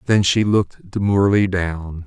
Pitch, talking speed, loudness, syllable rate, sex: 95 Hz, 145 wpm, -18 LUFS, 4.7 syllables/s, male